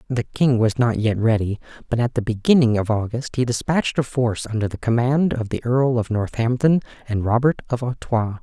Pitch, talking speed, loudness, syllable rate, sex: 120 Hz, 200 wpm, -21 LUFS, 5.4 syllables/s, male